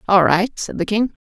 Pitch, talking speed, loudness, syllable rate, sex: 205 Hz, 245 wpm, -18 LUFS, 5.0 syllables/s, female